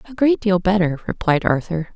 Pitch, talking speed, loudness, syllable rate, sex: 190 Hz, 185 wpm, -19 LUFS, 5.3 syllables/s, female